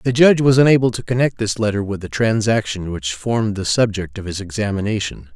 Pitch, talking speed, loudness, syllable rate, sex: 110 Hz, 200 wpm, -18 LUFS, 6.0 syllables/s, male